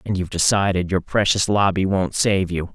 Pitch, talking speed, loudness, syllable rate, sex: 95 Hz, 195 wpm, -19 LUFS, 5.3 syllables/s, male